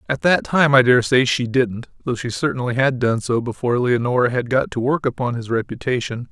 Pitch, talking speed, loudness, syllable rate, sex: 125 Hz, 210 wpm, -19 LUFS, 5.7 syllables/s, male